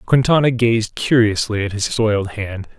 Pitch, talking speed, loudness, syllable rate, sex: 110 Hz, 150 wpm, -17 LUFS, 4.6 syllables/s, male